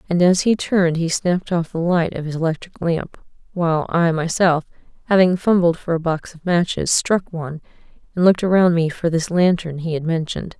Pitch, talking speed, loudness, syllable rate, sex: 170 Hz, 200 wpm, -19 LUFS, 5.5 syllables/s, female